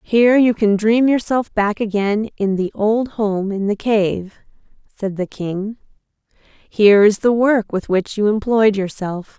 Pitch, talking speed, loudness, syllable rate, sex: 210 Hz, 165 wpm, -17 LUFS, 4.0 syllables/s, female